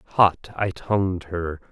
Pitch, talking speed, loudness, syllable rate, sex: 90 Hz, 140 wpm, -23 LUFS, 3.3 syllables/s, male